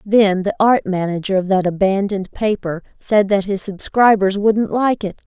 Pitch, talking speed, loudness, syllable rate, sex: 200 Hz, 170 wpm, -17 LUFS, 4.7 syllables/s, female